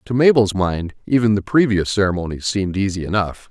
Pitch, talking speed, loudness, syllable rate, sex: 100 Hz, 170 wpm, -18 LUFS, 5.8 syllables/s, male